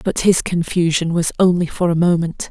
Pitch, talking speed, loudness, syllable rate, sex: 170 Hz, 190 wpm, -17 LUFS, 5.1 syllables/s, female